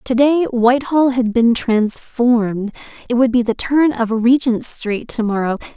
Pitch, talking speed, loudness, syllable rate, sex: 240 Hz, 145 wpm, -16 LUFS, 4.3 syllables/s, female